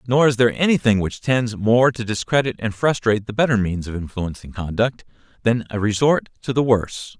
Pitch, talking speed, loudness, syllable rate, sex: 115 Hz, 190 wpm, -20 LUFS, 5.5 syllables/s, male